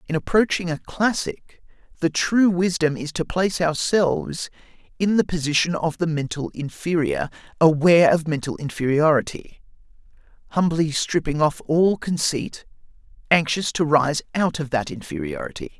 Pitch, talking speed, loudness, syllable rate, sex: 160 Hz, 130 wpm, -21 LUFS, 4.8 syllables/s, male